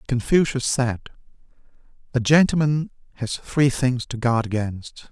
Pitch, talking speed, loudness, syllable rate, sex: 130 Hz, 115 wpm, -21 LUFS, 4.1 syllables/s, male